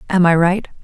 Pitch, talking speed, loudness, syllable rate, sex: 180 Hz, 215 wpm, -15 LUFS, 5.8 syllables/s, female